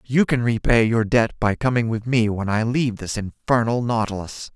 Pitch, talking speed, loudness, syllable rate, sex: 115 Hz, 200 wpm, -21 LUFS, 5.1 syllables/s, male